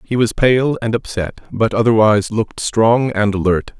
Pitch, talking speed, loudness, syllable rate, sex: 115 Hz, 175 wpm, -16 LUFS, 4.8 syllables/s, male